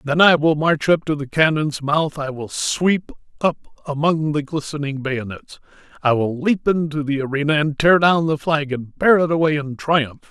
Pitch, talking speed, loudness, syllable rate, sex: 150 Hz, 200 wpm, -19 LUFS, 4.7 syllables/s, male